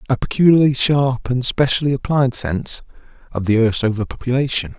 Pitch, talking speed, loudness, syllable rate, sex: 125 Hz, 140 wpm, -17 LUFS, 5.6 syllables/s, male